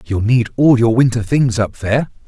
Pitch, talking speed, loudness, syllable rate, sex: 115 Hz, 210 wpm, -15 LUFS, 5.1 syllables/s, male